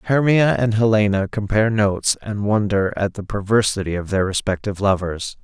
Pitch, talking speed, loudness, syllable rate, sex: 105 Hz, 155 wpm, -19 LUFS, 5.5 syllables/s, male